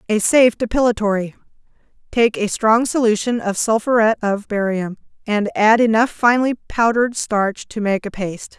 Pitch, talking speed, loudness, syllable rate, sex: 220 Hz, 140 wpm, -17 LUFS, 5.2 syllables/s, female